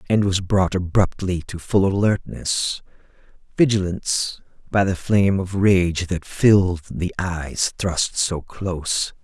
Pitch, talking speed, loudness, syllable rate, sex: 95 Hz, 130 wpm, -21 LUFS, 3.9 syllables/s, male